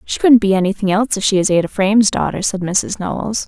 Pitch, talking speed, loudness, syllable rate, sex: 200 Hz, 240 wpm, -15 LUFS, 6.2 syllables/s, female